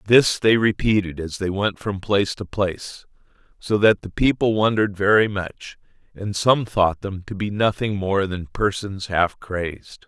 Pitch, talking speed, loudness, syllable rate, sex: 100 Hz, 175 wpm, -21 LUFS, 4.4 syllables/s, male